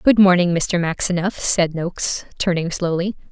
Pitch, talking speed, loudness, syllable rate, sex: 175 Hz, 145 wpm, -19 LUFS, 4.7 syllables/s, female